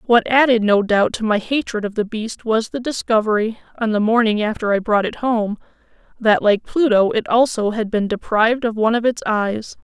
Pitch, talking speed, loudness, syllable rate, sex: 220 Hz, 205 wpm, -18 LUFS, 5.2 syllables/s, female